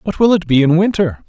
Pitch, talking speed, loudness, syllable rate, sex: 170 Hz, 280 wpm, -13 LUFS, 5.7 syllables/s, male